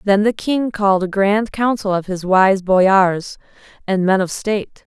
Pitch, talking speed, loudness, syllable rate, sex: 200 Hz, 180 wpm, -16 LUFS, 4.2 syllables/s, female